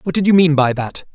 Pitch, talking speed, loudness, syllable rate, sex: 155 Hz, 315 wpm, -14 LUFS, 5.9 syllables/s, male